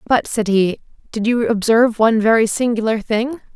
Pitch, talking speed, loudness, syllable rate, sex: 225 Hz, 170 wpm, -17 LUFS, 5.4 syllables/s, female